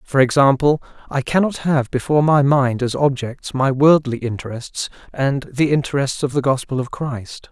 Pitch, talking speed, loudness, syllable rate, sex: 135 Hz, 170 wpm, -18 LUFS, 4.8 syllables/s, male